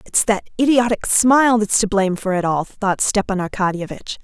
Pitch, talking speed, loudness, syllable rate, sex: 205 Hz, 185 wpm, -17 LUFS, 5.2 syllables/s, female